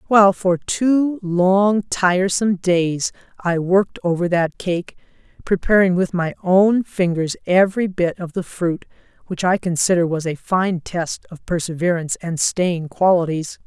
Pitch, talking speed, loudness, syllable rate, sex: 180 Hz, 145 wpm, -19 LUFS, 4.3 syllables/s, female